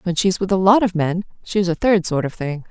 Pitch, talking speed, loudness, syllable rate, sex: 180 Hz, 330 wpm, -19 LUFS, 6.3 syllables/s, female